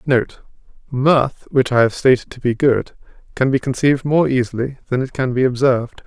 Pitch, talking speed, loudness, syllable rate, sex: 130 Hz, 180 wpm, -17 LUFS, 5.4 syllables/s, male